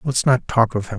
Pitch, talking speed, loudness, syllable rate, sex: 120 Hz, 305 wpm, -18 LUFS, 5.3 syllables/s, male